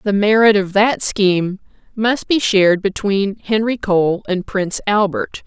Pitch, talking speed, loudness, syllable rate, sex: 205 Hz, 155 wpm, -16 LUFS, 4.2 syllables/s, female